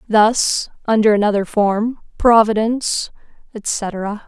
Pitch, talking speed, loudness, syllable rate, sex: 215 Hz, 85 wpm, -17 LUFS, 3.6 syllables/s, female